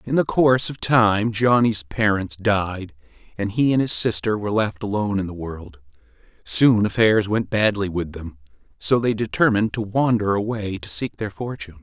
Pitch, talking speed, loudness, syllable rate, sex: 105 Hz, 180 wpm, -21 LUFS, 5.0 syllables/s, male